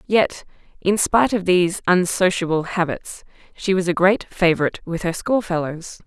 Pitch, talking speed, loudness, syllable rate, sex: 180 Hz, 160 wpm, -20 LUFS, 5.0 syllables/s, female